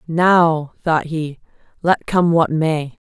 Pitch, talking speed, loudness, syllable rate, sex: 160 Hz, 135 wpm, -17 LUFS, 3.0 syllables/s, female